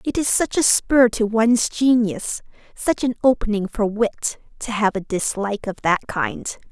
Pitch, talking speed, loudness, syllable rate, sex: 225 Hz, 180 wpm, -20 LUFS, 4.4 syllables/s, female